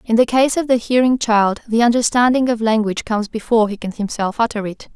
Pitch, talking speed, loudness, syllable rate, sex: 225 Hz, 220 wpm, -17 LUFS, 6.1 syllables/s, female